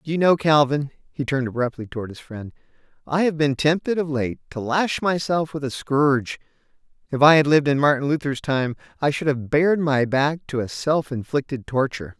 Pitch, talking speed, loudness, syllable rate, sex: 140 Hz, 200 wpm, -21 LUFS, 5.6 syllables/s, male